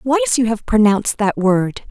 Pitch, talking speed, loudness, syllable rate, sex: 210 Hz, 190 wpm, -16 LUFS, 5.3 syllables/s, female